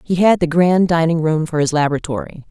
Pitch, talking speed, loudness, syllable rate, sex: 165 Hz, 215 wpm, -16 LUFS, 5.8 syllables/s, female